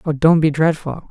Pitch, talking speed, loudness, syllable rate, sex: 155 Hz, 215 wpm, -16 LUFS, 5.4 syllables/s, male